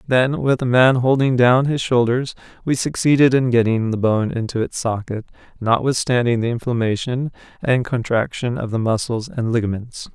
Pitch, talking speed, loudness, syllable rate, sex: 120 Hz, 160 wpm, -19 LUFS, 5.0 syllables/s, male